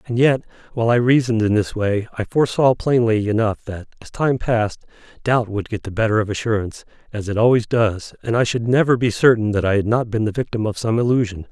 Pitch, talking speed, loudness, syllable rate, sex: 115 Hz, 225 wpm, -19 LUFS, 6.0 syllables/s, male